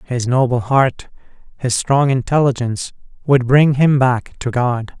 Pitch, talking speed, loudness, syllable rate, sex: 130 Hz, 145 wpm, -16 LUFS, 4.2 syllables/s, male